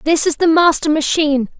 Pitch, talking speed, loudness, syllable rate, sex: 310 Hz, 190 wpm, -14 LUFS, 5.4 syllables/s, female